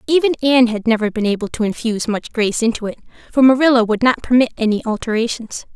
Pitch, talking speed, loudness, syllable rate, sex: 235 Hz, 200 wpm, -16 LUFS, 6.8 syllables/s, female